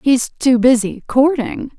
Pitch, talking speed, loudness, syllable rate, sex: 250 Hz, 135 wpm, -15 LUFS, 3.9 syllables/s, female